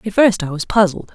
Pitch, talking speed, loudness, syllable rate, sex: 195 Hz, 260 wpm, -16 LUFS, 5.8 syllables/s, female